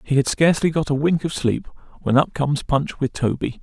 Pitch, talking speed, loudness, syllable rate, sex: 145 Hz, 230 wpm, -21 LUFS, 5.7 syllables/s, male